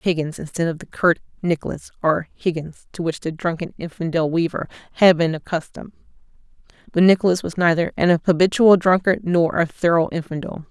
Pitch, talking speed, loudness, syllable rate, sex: 170 Hz, 155 wpm, -20 LUFS, 5.6 syllables/s, female